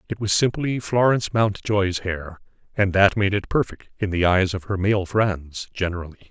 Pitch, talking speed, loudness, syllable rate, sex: 100 Hz, 180 wpm, -22 LUFS, 4.8 syllables/s, male